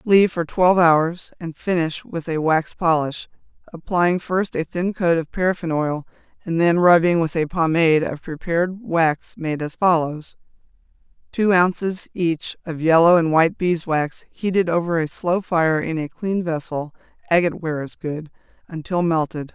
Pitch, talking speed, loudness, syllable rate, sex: 165 Hz, 165 wpm, -20 LUFS, 4.5 syllables/s, female